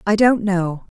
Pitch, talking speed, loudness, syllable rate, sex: 195 Hz, 180 wpm, -18 LUFS, 3.9 syllables/s, female